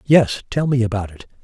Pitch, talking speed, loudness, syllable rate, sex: 125 Hz, 210 wpm, -19 LUFS, 5.3 syllables/s, male